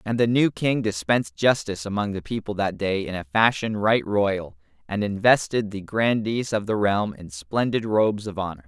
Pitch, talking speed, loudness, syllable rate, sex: 105 Hz, 185 wpm, -23 LUFS, 4.8 syllables/s, male